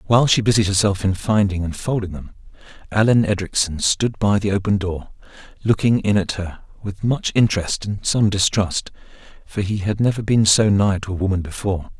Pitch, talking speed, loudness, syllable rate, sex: 100 Hz, 185 wpm, -19 LUFS, 5.5 syllables/s, male